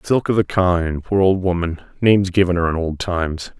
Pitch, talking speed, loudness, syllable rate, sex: 90 Hz, 235 wpm, -18 LUFS, 5.5 syllables/s, male